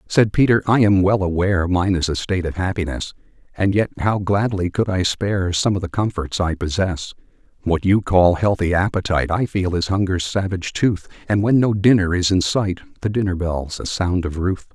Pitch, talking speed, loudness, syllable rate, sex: 95 Hz, 205 wpm, -19 LUFS, 5.3 syllables/s, male